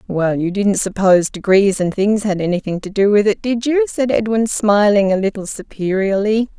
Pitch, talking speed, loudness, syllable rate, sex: 205 Hz, 190 wpm, -16 LUFS, 5.1 syllables/s, female